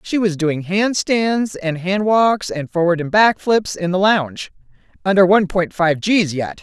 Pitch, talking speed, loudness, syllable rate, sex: 190 Hz, 170 wpm, -17 LUFS, 4.3 syllables/s, female